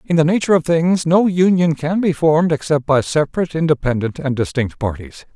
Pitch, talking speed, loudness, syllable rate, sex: 155 Hz, 190 wpm, -17 LUFS, 5.8 syllables/s, male